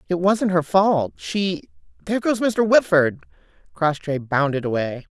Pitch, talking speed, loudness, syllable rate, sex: 175 Hz, 130 wpm, -20 LUFS, 4.3 syllables/s, female